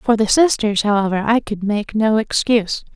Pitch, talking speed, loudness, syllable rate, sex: 215 Hz, 180 wpm, -17 LUFS, 5.0 syllables/s, female